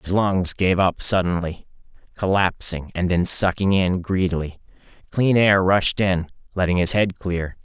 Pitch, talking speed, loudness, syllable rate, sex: 90 Hz, 150 wpm, -20 LUFS, 4.3 syllables/s, male